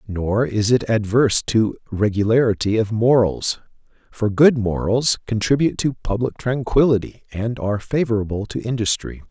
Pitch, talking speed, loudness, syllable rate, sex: 115 Hz, 130 wpm, -19 LUFS, 4.9 syllables/s, male